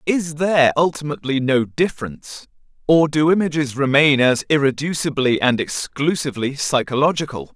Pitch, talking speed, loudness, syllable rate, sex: 145 Hz, 110 wpm, -18 LUFS, 5.3 syllables/s, male